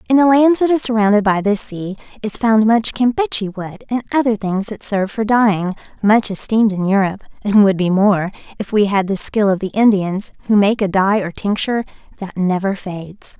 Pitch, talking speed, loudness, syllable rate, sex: 210 Hz, 205 wpm, -16 LUFS, 5.4 syllables/s, female